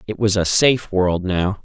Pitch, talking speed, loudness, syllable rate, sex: 100 Hz, 220 wpm, -18 LUFS, 4.8 syllables/s, male